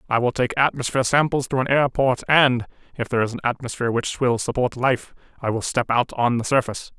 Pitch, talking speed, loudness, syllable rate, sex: 125 Hz, 225 wpm, -21 LUFS, 6.1 syllables/s, male